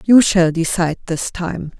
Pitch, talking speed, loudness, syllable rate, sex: 175 Hz, 165 wpm, -17 LUFS, 4.5 syllables/s, female